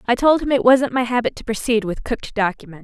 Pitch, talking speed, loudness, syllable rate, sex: 235 Hz, 255 wpm, -19 LUFS, 6.3 syllables/s, female